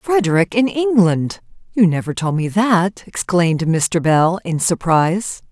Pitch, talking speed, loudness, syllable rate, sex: 185 Hz, 140 wpm, -17 LUFS, 4.2 syllables/s, female